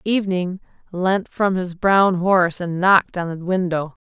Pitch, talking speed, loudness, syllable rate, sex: 185 Hz, 165 wpm, -19 LUFS, 4.5 syllables/s, female